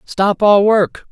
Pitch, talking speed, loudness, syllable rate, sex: 205 Hz, 160 wpm, -13 LUFS, 3.1 syllables/s, male